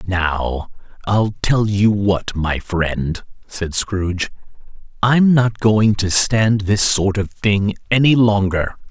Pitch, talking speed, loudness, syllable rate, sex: 100 Hz, 140 wpm, -17 LUFS, 3.4 syllables/s, male